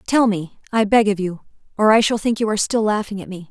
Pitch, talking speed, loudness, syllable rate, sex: 210 Hz, 275 wpm, -19 LUFS, 6.2 syllables/s, female